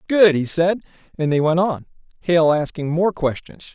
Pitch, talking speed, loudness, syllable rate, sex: 170 Hz, 160 wpm, -19 LUFS, 4.5 syllables/s, male